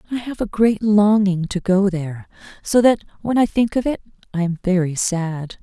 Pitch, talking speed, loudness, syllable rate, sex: 200 Hz, 205 wpm, -19 LUFS, 5.0 syllables/s, female